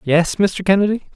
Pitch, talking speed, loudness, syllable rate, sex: 190 Hz, 155 wpm, -17 LUFS, 4.9 syllables/s, male